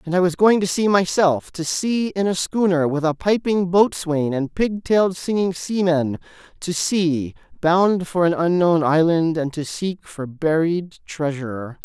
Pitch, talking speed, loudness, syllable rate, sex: 170 Hz, 170 wpm, -20 LUFS, 4.2 syllables/s, male